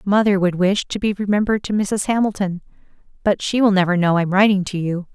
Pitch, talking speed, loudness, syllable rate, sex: 195 Hz, 220 wpm, -18 LUFS, 6.1 syllables/s, female